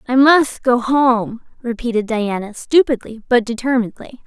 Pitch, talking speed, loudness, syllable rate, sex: 240 Hz, 125 wpm, -17 LUFS, 4.7 syllables/s, female